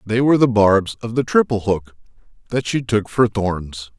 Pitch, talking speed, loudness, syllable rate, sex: 110 Hz, 195 wpm, -18 LUFS, 4.7 syllables/s, male